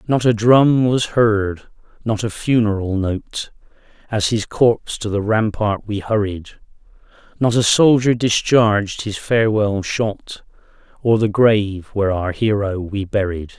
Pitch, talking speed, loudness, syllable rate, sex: 105 Hz, 140 wpm, -18 LUFS, 4.3 syllables/s, male